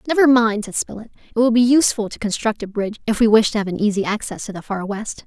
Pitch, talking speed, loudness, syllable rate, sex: 220 Hz, 275 wpm, -19 LUFS, 6.6 syllables/s, female